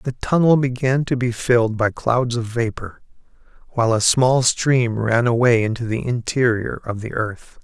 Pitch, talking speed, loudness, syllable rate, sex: 120 Hz, 175 wpm, -19 LUFS, 4.6 syllables/s, male